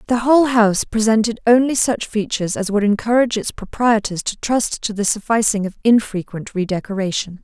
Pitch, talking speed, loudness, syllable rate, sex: 215 Hz, 170 wpm, -18 LUFS, 5.7 syllables/s, female